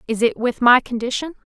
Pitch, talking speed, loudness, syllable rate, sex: 245 Hz, 200 wpm, -18 LUFS, 5.8 syllables/s, female